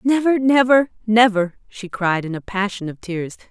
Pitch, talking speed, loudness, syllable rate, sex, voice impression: 215 Hz, 170 wpm, -18 LUFS, 4.6 syllables/s, female, feminine, adult-like, tensed, powerful, clear, fluent, intellectual, elegant, strict, sharp